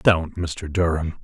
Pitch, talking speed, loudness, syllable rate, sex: 85 Hz, 145 wpm, -23 LUFS, 3.5 syllables/s, male